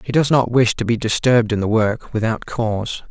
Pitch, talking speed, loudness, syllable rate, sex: 115 Hz, 230 wpm, -18 LUFS, 5.4 syllables/s, male